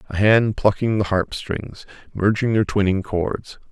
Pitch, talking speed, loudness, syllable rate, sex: 100 Hz, 145 wpm, -20 LUFS, 4.1 syllables/s, male